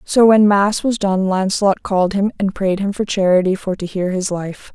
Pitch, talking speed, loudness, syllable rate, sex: 195 Hz, 230 wpm, -16 LUFS, 5.0 syllables/s, female